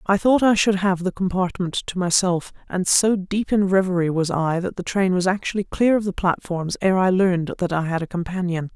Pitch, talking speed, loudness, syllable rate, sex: 185 Hz, 225 wpm, -21 LUFS, 5.3 syllables/s, female